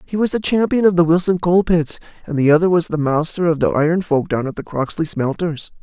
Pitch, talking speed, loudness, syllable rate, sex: 165 Hz, 245 wpm, -17 LUFS, 5.8 syllables/s, male